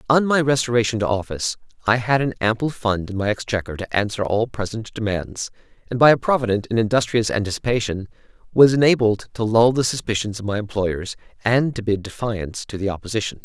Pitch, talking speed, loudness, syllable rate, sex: 110 Hz, 185 wpm, -21 LUFS, 6.0 syllables/s, male